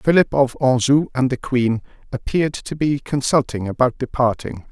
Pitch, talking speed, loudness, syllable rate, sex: 130 Hz, 155 wpm, -19 LUFS, 4.9 syllables/s, male